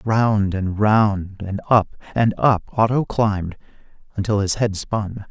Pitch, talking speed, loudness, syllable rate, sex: 105 Hz, 145 wpm, -20 LUFS, 3.8 syllables/s, male